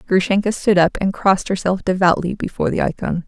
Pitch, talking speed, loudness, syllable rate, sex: 185 Hz, 185 wpm, -18 LUFS, 6.1 syllables/s, female